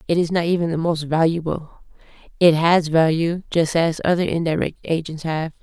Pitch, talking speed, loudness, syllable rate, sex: 165 Hz, 170 wpm, -20 LUFS, 5.3 syllables/s, female